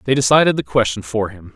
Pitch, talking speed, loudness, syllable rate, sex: 115 Hz, 230 wpm, -17 LUFS, 6.4 syllables/s, male